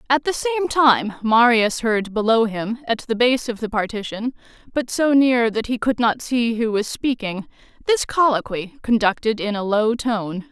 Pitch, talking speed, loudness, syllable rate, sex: 235 Hz, 185 wpm, -20 LUFS, 4.4 syllables/s, female